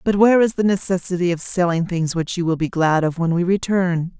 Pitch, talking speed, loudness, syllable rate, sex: 180 Hz, 245 wpm, -19 LUFS, 5.6 syllables/s, female